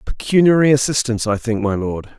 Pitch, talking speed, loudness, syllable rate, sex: 125 Hz, 165 wpm, -17 LUFS, 5.8 syllables/s, male